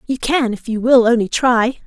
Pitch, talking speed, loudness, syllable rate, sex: 240 Hz, 225 wpm, -15 LUFS, 4.8 syllables/s, female